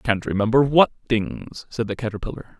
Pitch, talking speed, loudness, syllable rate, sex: 115 Hz, 160 wpm, -21 LUFS, 5.2 syllables/s, male